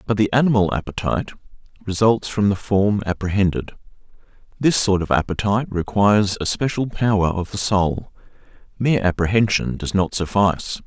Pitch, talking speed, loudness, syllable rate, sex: 100 Hz, 130 wpm, -20 LUFS, 5.5 syllables/s, male